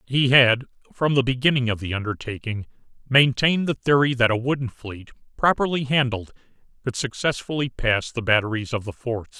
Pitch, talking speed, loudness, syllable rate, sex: 125 Hz, 160 wpm, -22 LUFS, 5.4 syllables/s, male